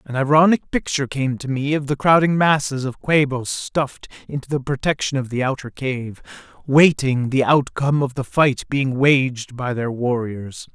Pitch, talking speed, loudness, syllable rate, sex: 135 Hz, 175 wpm, -19 LUFS, 4.7 syllables/s, male